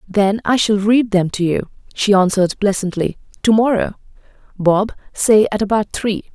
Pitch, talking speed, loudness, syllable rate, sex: 205 Hz, 160 wpm, -16 LUFS, 4.8 syllables/s, female